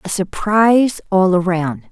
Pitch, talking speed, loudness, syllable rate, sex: 190 Hz, 125 wpm, -15 LUFS, 4.2 syllables/s, female